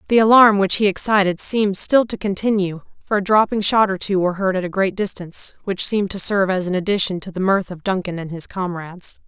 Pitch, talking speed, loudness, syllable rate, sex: 195 Hz, 235 wpm, -18 LUFS, 6.0 syllables/s, female